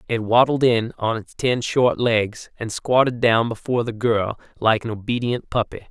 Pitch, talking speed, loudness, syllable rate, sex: 115 Hz, 185 wpm, -20 LUFS, 4.6 syllables/s, male